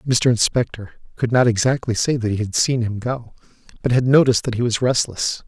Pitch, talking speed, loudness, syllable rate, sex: 120 Hz, 210 wpm, -19 LUFS, 5.4 syllables/s, male